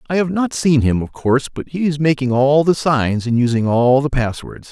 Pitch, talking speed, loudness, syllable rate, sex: 135 Hz, 240 wpm, -16 LUFS, 5.2 syllables/s, male